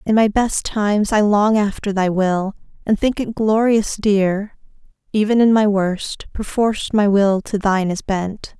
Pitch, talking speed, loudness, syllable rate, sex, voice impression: 205 Hz, 175 wpm, -18 LUFS, 4.2 syllables/s, female, feminine, adult-like, slightly tensed, slightly powerful, clear, slightly fluent, intellectual, calm, slightly friendly, reassuring, kind, slightly modest